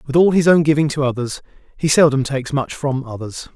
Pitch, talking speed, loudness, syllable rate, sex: 140 Hz, 220 wpm, -17 LUFS, 6.0 syllables/s, male